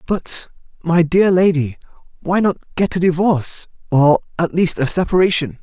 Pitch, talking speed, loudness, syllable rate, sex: 170 Hz, 150 wpm, -16 LUFS, 4.8 syllables/s, male